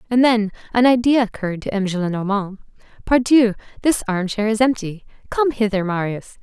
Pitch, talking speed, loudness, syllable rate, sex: 215 Hz, 140 wpm, -19 LUFS, 5.5 syllables/s, female